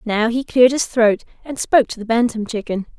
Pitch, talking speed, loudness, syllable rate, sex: 235 Hz, 220 wpm, -18 LUFS, 5.8 syllables/s, female